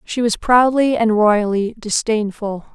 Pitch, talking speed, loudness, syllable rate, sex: 220 Hz, 130 wpm, -17 LUFS, 3.9 syllables/s, female